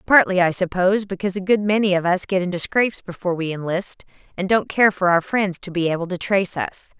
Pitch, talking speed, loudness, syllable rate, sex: 190 Hz, 230 wpm, -20 LUFS, 6.2 syllables/s, female